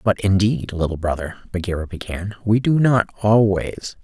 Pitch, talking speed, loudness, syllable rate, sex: 100 Hz, 150 wpm, -20 LUFS, 4.8 syllables/s, male